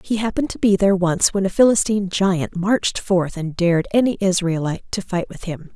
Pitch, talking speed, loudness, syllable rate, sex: 190 Hz, 210 wpm, -19 LUFS, 5.9 syllables/s, female